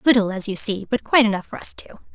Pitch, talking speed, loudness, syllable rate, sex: 215 Hz, 280 wpm, -20 LUFS, 7.4 syllables/s, female